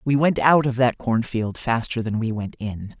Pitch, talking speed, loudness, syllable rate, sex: 120 Hz, 220 wpm, -22 LUFS, 4.6 syllables/s, male